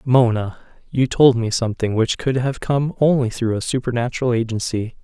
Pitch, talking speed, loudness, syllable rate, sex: 120 Hz, 165 wpm, -19 LUFS, 5.3 syllables/s, male